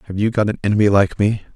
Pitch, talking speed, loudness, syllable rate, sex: 105 Hz, 270 wpm, -17 LUFS, 7.1 syllables/s, male